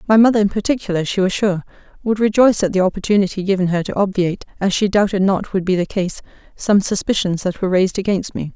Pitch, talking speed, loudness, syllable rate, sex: 195 Hz, 215 wpm, -18 LUFS, 6.7 syllables/s, female